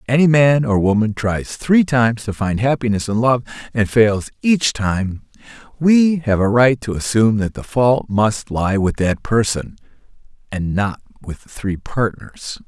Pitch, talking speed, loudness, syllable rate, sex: 115 Hz, 175 wpm, -17 LUFS, 4.4 syllables/s, male